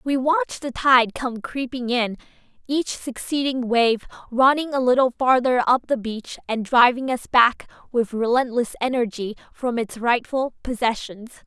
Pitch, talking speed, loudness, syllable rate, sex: 245 Hz, 145 wpm, -21 LUFS, 4.3 syllables/s, female